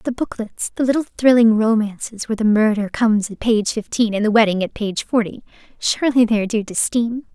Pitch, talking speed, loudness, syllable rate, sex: 220 Hz, 195 wpm, -18 LUFS, 5.9 syllables/s, female